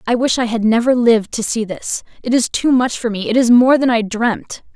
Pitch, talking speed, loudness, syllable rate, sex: 235 Hz, 255 wpm, -15 LUFS, 5.3 syllables/s, female